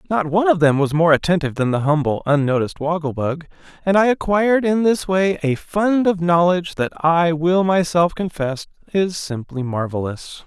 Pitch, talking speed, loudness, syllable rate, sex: 165 Hz, 180 wpm, -18 LUFS, 5.1 syllables/s, male